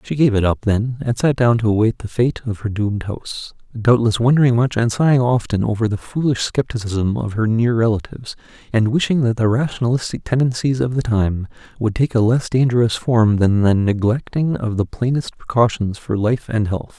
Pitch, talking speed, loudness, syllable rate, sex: 115 Hz, 200 wpm, -18 LUFS, 5.3 syllables/s, male